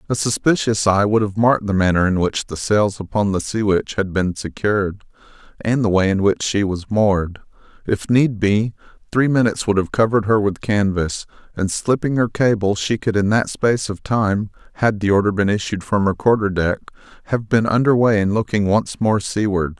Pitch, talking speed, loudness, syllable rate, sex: 105 Hz, 205 wpm, -18 LUFS, 5.2 syllables/s, male